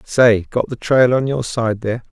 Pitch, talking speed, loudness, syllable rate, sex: 120 Hz, 220 wpm, -17 LUFS, 4.6 syllables/s, male